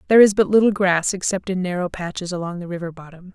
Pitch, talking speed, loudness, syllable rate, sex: 185 Hz, 235 wpm, -20 LUFS, 6.7 syllables/s, female